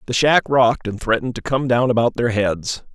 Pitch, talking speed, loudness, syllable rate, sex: 120 Hz, 225 wpm, -18 LUFS, 5.6 syllables/s, male